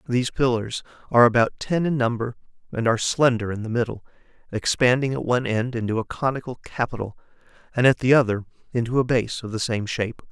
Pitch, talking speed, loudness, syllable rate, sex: 120 Hz, 185 wpm, -23 LUFS, 6.4 syllables/s, male